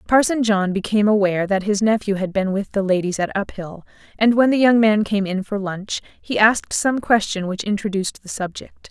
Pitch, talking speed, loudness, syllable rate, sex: 205 Hz, 210 wpm, -19 LUFS, 5.4 syllables/s, female